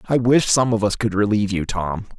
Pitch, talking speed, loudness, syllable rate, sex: 105 Hz, 245 wpm, -19 LUFS, 5.5 syllables/s, male